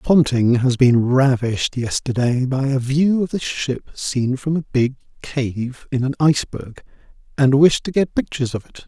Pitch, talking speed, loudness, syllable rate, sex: 130 Hz, 175 wpm, -19 LUFS, 4.4 syllables/s, male